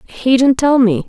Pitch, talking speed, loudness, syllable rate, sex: 250 Hz, 220 wpm, -13 LUFS, 4.4 syllables/s, female